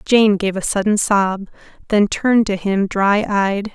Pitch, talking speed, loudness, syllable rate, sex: 205 Hz, 175 wpm, -17 LUFS, 4.0 syllables/s, female